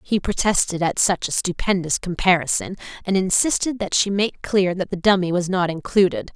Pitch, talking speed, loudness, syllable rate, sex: 190 Hz, 180 wpm, -20 LUFS, 5.2 syllables/s, female